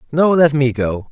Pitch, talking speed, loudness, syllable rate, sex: 140 Hz, 215 wpm, -15 LUFS, 4.7 syllables/s, male